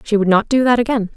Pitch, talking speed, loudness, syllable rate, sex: 220 Hz, 310 wpm, -15 LUFS, 6.8 syllables/s, female